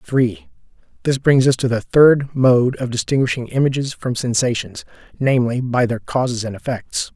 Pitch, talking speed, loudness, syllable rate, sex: 125 Hz, 160 wpm, -18 LUFS, 5.2 syllables/s, male